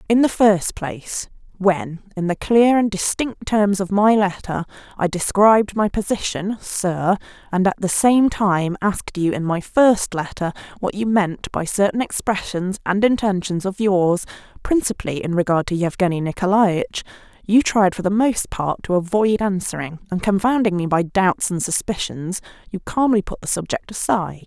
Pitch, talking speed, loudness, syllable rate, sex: 195 Hz, 165 wpm, -19 LUFS, 4.7 syllables/s, female